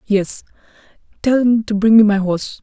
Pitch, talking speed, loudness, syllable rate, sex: 210 Hz, 185 wpm, -15 LUFS, 5.1 syllables/s, female